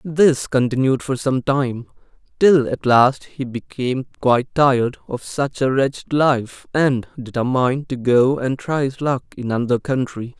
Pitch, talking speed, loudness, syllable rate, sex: 130 Hz, 160 wpm, -19 LUFS, 4.4 syllables/s, male